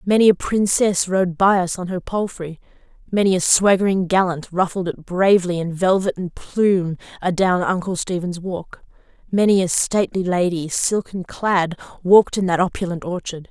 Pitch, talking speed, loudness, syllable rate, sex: 185 Hz, 155 wpm, -19 LUFS, 5.0 syllables/s, female